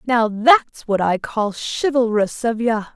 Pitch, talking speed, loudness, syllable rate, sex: 230 Hz, 165 wpm, -18 LUFS, 4.1 syllables/s, female